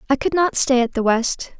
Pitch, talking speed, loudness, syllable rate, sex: 265 Hz, 265 wpm, -18 LUFS, 5.2 syllables/s, female